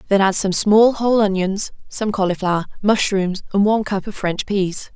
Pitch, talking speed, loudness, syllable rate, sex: 200 Hz, 180 wpm, -18 LUFS, 5.1 syllables/s, female